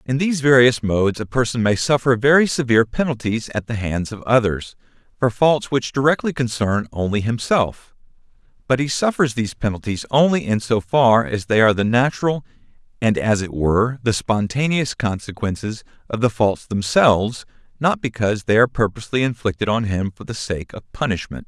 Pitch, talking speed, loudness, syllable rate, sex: 115 Hz, 170 wpm, -19 LUFS, 5.5 syllables/s, male